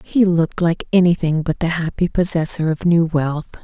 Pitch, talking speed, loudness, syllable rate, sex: 165 Hz, 180 wpm, -18 LUFS, 5.1 syllables/s, female